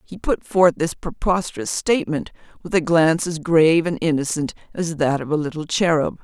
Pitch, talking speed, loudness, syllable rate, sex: 165 Hz, 185 wpm, -20 LUFS, 5.4 syllables/s, female